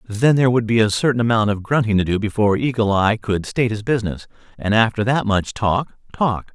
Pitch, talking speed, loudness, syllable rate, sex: 110 Hz, 220 wpm, -19 LUFS, 5.9 syllables/s, male